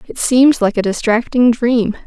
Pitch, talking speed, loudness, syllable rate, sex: 235 Hz, 175 wpm, -14 LUFS, 4.4 syllables/s, female